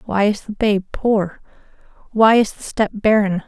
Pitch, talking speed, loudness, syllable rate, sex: 210 Hz, 175 wpm, -18 LUFS, 4.7 syllables/s, female